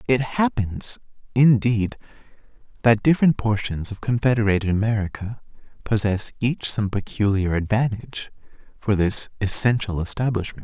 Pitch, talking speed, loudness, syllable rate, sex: 110 Hz, 100 wpm, -22 LUFS, 5.0 syllables/s, male